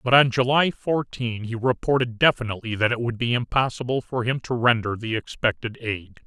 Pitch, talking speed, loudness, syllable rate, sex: 120 Hz, 180 wpm, -23 LUFS, 5.4 syllables/s, male